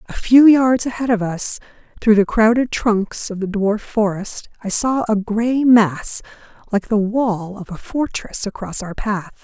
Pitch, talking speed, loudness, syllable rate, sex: 215 Hz, 180 wpm, -18 LUFS, 4.1 syllables/s, female